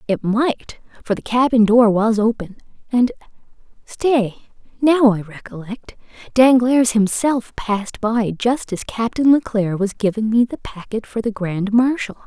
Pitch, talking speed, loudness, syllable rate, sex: 225 Hz, 130 wpm, -18 LUFS, 4.3 syllables/s, female